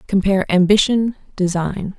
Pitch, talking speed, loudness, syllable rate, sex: 195 Hz, 90 wpm, -17 LUFS, 4.9 syllables/s, female